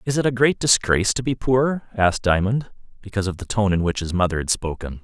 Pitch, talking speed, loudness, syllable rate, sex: 105 Hz, 240 wpm, -21 LUFS, 6.2 syllables/s, male